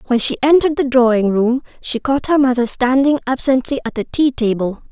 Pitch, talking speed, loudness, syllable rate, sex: 255 Hz, 195 wpm, -16 LUFS, 5.6 syllables/s, female